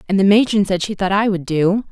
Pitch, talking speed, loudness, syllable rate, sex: 195 Hz, 280 wpm, -16 LUFS, 5.9 syllables/s, female